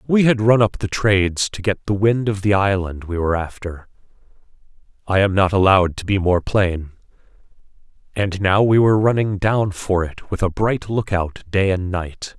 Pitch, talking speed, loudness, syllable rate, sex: 100 Hz, 180 wpm, -18 LUFS, 4.9 syllables/s, male